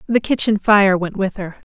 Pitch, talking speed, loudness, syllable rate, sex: 200 Hz, 210 wpm, -16 LUFS, 4.7 syllables/s, female